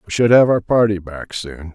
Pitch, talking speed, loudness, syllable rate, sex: 100 Hz, 240 wpm, -15 LUFS, 5.9 syllables/s, male